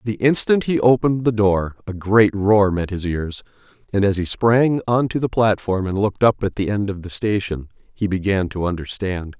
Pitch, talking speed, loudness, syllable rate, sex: 105 Hz, 210 wpm, -19 LUFS, 5.0 syllables/s, male